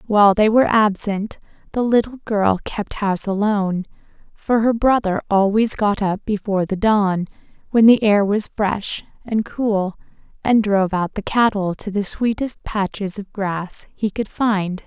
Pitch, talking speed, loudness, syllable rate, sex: 205 Hz, 160 wpm, -19 LUFS, 4.4 syllables/s, female